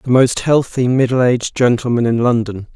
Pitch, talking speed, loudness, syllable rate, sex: 120 Hz, 175 wpm, -15 LUFS, 5.4 syllables/s, male